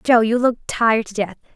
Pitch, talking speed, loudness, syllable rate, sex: 225 Hz, 230 wpm, -19 LUFS, 5.7 syllables/s, female